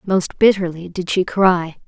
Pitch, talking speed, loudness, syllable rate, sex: 180 Hz, 160 wpm, -17 LUFS, 4.1 syllables/s, female